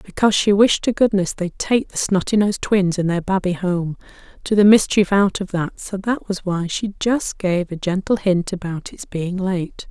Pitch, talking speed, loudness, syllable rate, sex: 190 Hz, 205 wpm, -19 LUFS, 4.8 syllables/s, female